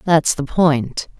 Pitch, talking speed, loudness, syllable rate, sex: 150 Hz, 150 wpm, -17 LUFS, 3.1 syllables/s, female